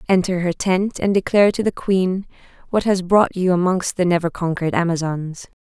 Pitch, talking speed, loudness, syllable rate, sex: 185 Hz, 180 wpm, -19 LUFS, 5.3 syllables/s, female